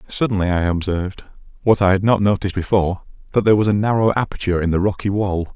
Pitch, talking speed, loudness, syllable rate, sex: 100 Hz, 205 wpm, -18 LUFS, 7.1 syllables/s, male